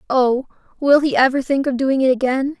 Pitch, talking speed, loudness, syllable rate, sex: 265 Hz, 210 wpm, -17 LUFS, 5.3 syllables/s, female